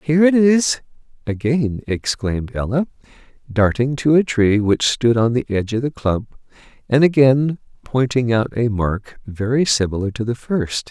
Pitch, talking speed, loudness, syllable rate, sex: 125 Hz, 160 wpm, -18 LUFS, 4.6 syllables/s, male